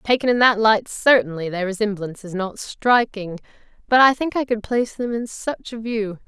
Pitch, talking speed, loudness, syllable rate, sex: 220 Hz, 200 wpm, -20 LUFS, 5.1 syllables/s, female